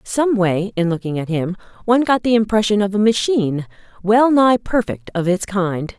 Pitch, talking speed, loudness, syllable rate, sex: 205 Hz, 180 wpm, -17 LUFS, 5.2 syllables/s, female